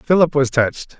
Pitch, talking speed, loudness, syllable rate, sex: 145 Hz, 180 wpm, -17 LUFS, 5.3 syllables/s, male